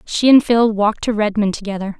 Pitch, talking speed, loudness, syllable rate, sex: 215 Hz, 210 wpm, -16 LUFS, 5.8 syllables/s, female